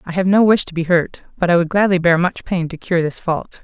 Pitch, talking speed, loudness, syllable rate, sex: 175 Hz, 295 wpm, -17 LUFS, 5.6 syllables/s, female